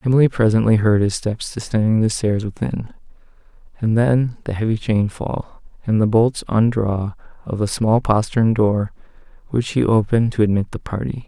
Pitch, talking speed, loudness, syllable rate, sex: 110 Hz, 165 wpm, -19 LUFS, 4.9 syllables/s, male